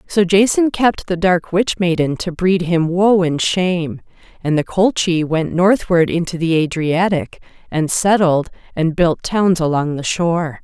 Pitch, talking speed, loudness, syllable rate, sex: 175 Hz, 165 wpm, -16 LUFS, 4.2 syllables/s, female